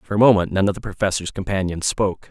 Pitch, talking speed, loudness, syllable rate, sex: 95 Hz, 235 wpm, -20 LUFS, 6.8 syllables/s, male